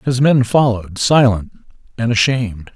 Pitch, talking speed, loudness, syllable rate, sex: 115 Hz, 130 wpm, -15 LUFS, 5.0 syllables/s, male